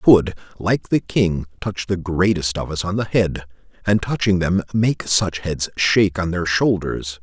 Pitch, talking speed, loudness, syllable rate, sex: 90 Hz, 190 wpm, -20 LUFS, 4.4 syllables/s, male